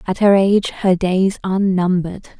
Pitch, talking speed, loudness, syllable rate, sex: 190 Hz, 175 wpm, -16 LUFS, 5.5 syllables/s, female